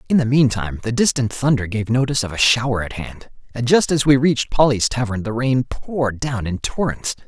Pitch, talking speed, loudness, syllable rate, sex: 120 Hz, 215 wpm, -19 LUFS, 5.6 syllables/s, male